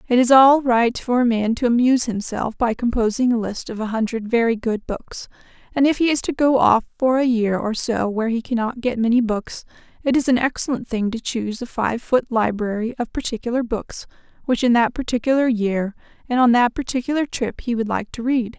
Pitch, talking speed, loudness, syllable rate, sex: 235 Hz, 215 wpm, -20 LUFS, 5.5 syllables/s, female